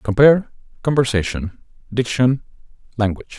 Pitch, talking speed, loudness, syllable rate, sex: 120 Hz, 70 wpm, -19 LUFS, 5.5 syllables/s, male